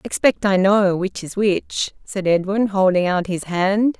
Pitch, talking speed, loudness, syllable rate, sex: 195 Hz, 195 wpm, -19 LUFS, 4.3 syllables/s, female